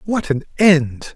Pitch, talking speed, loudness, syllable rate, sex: 160 Hz, 155 wpm, -16 LUFS, 3.3 syllables/s, male